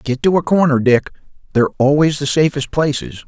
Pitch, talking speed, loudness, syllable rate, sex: 145 Hz, 185 wpm, -15 LUFS, 5.6 syllables/s, male